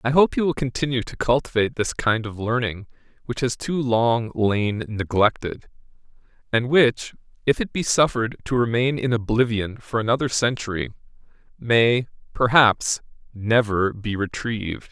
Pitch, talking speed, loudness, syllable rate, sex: 120 Hz, 140 wpm, -22 LUFS, 4.7 syllables/s, male